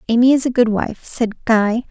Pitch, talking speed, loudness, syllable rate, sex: 235 Hz, 220 wpm, -17 LUFS, 4.9 syllables/s, female